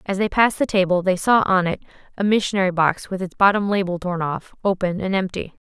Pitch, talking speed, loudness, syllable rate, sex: 190 Hz, 220 wpm, -20 LUFS, 6.0 syllables/s, female